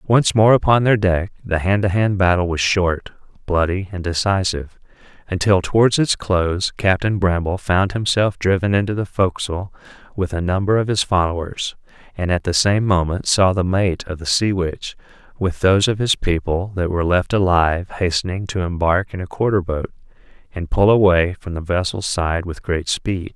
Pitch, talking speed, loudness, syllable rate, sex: 95 Hz, 180 wpm, -18 LUFS, 5.1 syllables/s, male